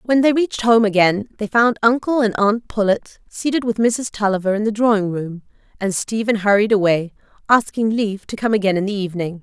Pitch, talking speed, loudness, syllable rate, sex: 215 Hz, 195 wpm, -18 LUFS, 5.6 syllables/s, female